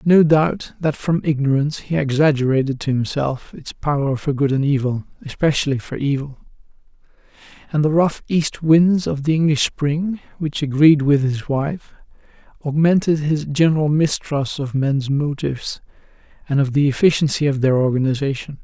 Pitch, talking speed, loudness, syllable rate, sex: 145 Hz, 145 wpm, -19 LUFS, 4.8 syllables/s, male